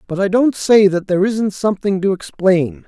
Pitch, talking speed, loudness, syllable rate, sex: 195 Hz, 210 wpm, -16 LUFS, 5.2 syllables/s, male